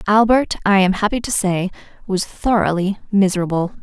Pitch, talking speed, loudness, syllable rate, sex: 200 Hz, 140 wpm, -18 LUFS, 5.2 syllables/s, female